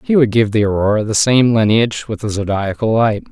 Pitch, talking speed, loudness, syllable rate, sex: 110 Hz, 215 wpm, -15 LUFS, 5.7 syllables/s, male